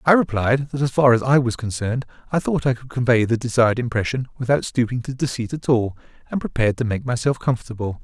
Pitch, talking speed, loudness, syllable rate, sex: 125 Hz, 215 wpm, -21 LUFS, 6.4 syllables/s, male